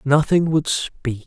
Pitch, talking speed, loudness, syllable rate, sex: 145 Hz, 140 wpm, -19 LUFS, 3.5 syllables/s, male